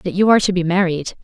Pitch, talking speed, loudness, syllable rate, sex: 180 Hz, 290 wpm, -16 LUFS, 6.9 syllables/s, female